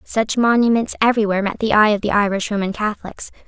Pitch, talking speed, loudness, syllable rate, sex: 210 Hz, 205 wpm, -17 LUFS, 6.6 syllables/s, female